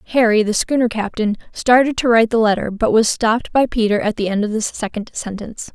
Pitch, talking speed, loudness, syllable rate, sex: 220 Hz, 220 wpm, -17 LUFS, 6.1 syllables/s, female